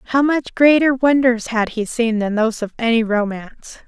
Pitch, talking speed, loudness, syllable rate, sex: 240 Hz, 185 wpm, -17 LUFS, 5.3 syllables/s, female